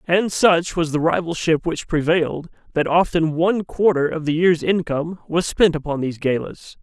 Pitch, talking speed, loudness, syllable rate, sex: 165 Hz, 175 wpm, -19 LUFS, 5.0 syllables/s, male